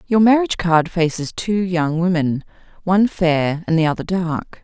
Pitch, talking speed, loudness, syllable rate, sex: 175 Hz, 170 wpm, -18 LUFS, 4.7 syllables/s, female